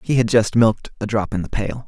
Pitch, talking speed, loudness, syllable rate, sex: 110 Hz, 290 wpm, -19 LUFS, 5.9 syllables/s, male